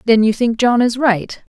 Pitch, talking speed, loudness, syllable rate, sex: 230 Hz, 230 wpm, -15 LUFS, 4.6 syllables/s, female